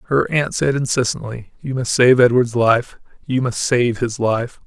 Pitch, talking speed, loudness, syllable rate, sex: 125 Hz, 180 wpm, -17 LUFS, 4.4 syllables/s, male